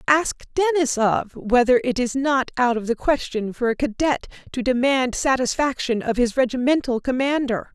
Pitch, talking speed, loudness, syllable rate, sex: 255 Hz, 155 wpm, -21 LUFS, 5.0 syllables/s, female